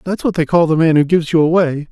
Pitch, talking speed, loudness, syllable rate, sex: 165 Hz, 315 wpm, -14 LUFS, 6.7 syllables/s, male